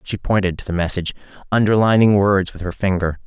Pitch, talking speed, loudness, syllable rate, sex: 95 Hz, 185 wpm, -18 LUFS, 6.2 syllables/s, male